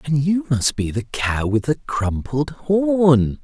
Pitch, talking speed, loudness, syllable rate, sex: 135 Hz, 175 wpm, -20 LUFS, 3.4 syllables/s, male